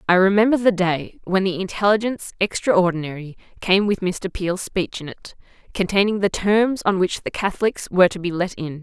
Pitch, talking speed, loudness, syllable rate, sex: 190 Hz, 185 wpm, -20 LUFS, 5.3 syllables/s, female